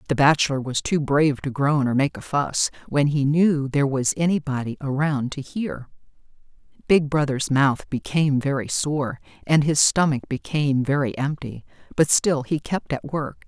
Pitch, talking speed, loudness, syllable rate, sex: 140 Hz, 170 wpm, -22 LUFS, 4.8 syllables/s, female